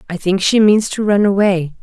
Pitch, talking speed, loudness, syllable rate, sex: 195 Hz, 230 wpm, -14 LUFS, 5.1 syllables/s, female